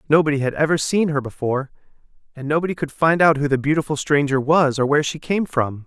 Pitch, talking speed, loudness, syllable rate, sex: 145 Hz, 215 wpm, -19 LUFS, 6.4 syllables/s, male